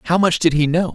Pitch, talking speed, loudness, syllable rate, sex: 165 Hz, 320 wpm, -17 LUFS, 5.5 syllables/s, male